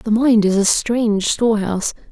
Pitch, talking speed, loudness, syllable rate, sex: 215 Hz, 170 wpm, -16 LUFS, 5.2 syllables/s, female